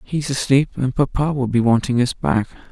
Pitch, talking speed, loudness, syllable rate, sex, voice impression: 125 Hz, 200 wpm, -19 LUFS, 5.0 syllables/s, male, very masculine, very adult-like, thick, relaxed, weak, dark, slightly soft, slightly muffled, slightly fluent, cool, intellectual, slightly refreshing, very sincere, very calm, mature, friendly, slightly reassuring, unique, very elegant, very sweet, slightly lively, very kind, very modest